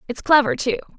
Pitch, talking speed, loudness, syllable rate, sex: 235 Hz, 185 wpm, -18 LUFS, 6.4 syllables/s, female